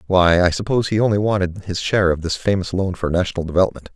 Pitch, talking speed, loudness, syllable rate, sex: 90 Hz, 230 wpm, -19 LUFS, 6.9 syllables/s, male